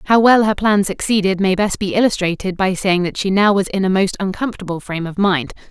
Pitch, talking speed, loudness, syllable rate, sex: 195 Hz, 230 wpm, -17 LUFS, 6.0 syllables/s, female